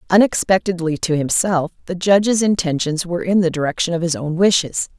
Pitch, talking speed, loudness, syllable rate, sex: 175 Hz, 170 wpm, -18 LUFS, 5.7 syllables/s, female